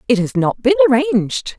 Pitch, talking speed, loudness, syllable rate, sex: 245 Hz, 190 wpm, -15 LUFS, 6.9 syllables/s, female